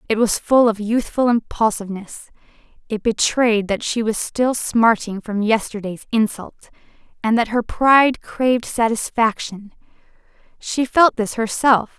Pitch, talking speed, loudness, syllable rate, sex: 225 Hz, 130 wpm, -18 LUFS, 4.4 syllables/s, female